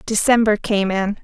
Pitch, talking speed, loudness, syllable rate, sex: 210 Hz, 145 wpm, -17 LUFS, 4.6 syllables/s, female